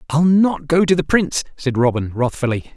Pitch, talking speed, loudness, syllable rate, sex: 150 Hz, 195 wpm, -17 LUFS, 5.4 syllables/s, male